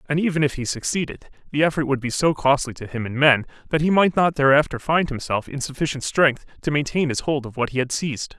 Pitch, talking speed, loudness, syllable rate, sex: 140 Hz, 245 wpm, -21 LUFS, 6.1 syllables/s, male